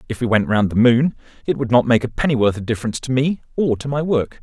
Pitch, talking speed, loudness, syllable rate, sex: 125 Hz, 270 wpm, -18 LUFS, 6.6 syllables/s, male